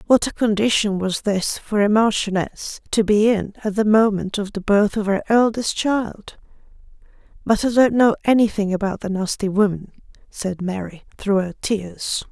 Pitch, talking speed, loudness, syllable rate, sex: 205 Hz, 170 wpm, -19 LUFS, 4.6 syllables/s, female